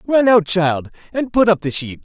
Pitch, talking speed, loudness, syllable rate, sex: 190 Hz, 235 wpm, -16 LUFS, 4.7 syllables/s, male